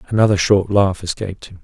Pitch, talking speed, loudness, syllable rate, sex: 100 Hz, 185 wpm, -17 LUFS, 6.3 syllables/s, male